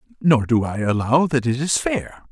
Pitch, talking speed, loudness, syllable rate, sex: 135 Hz, 205 wpm, -20 LUFS, 4.9 syllables/s, male